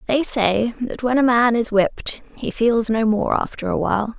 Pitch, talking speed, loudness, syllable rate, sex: 230 Hz, 200 wpm, -19 LUFS, 4.8 syllables/s, female